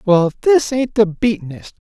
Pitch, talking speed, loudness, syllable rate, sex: 190 Hz, 190 wpm, -16 LUFS, 4.9 syllables/s, male